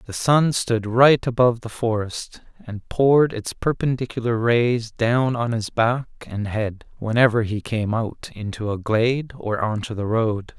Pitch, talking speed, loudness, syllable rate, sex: 115 Hz, 165 wpm, -21 LUFS, 4.2 syllables/s, male